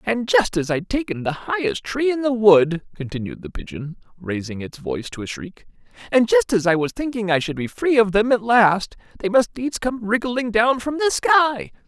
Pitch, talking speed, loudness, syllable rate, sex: 190 Hz, 215 wpm, -20 LUFS, 5.1 syllables/s, male